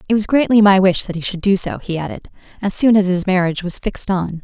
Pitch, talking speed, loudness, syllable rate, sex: 190 Hz, 270 wpm, -16 LUFS, 6.4 syllables/s, female